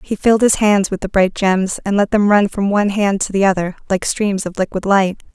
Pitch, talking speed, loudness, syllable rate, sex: 200 Hz, 260 wpm, -16 LUFS, 5.4 syllables/s, female